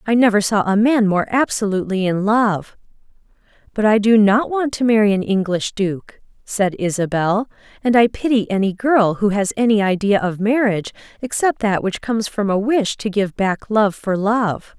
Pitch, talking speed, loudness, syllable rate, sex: 210 Hz, 185 wpm, -17 LUFS, 4.9 syllables/s, female